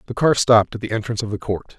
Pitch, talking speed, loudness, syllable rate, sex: 110 Hz, 305 wpm, -19 LUFS, 8.2 syllables/s, male